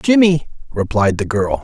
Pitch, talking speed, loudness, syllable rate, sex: 130 Hz, 145 wpm, -16 LUFS, 4.5 syllables/s, male